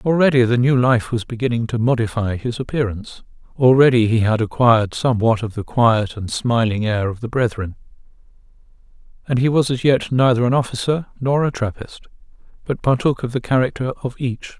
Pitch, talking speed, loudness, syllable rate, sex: 120 Hz, 175 wpm, -18 LUFS, 5.6 syllables/s, male